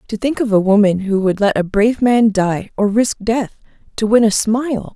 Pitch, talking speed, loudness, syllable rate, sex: 215 Hz, 230 wpm, -15 LUFS, 5.1 syllables/s, female